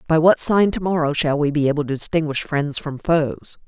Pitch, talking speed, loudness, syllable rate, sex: 150 Hz, 230 wpm, -19 LUFS, 5.2 syllables/s, female